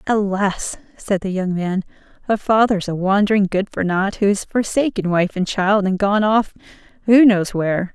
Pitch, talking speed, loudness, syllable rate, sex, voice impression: 200 Hz, 180 wpm, -18 LUFS, 4.9 syllables/s, female, very feminine, very adult-like, middle-aged, slightly thin, relaxed, slightly weak, slightly bright, very soft, very clear, very fluent, very cute, very intellectual, refreshing, very sincere, very calm, very friendly, very reassuring, very unique, very elegant, very sweet, lively, very kind, modest, slightly light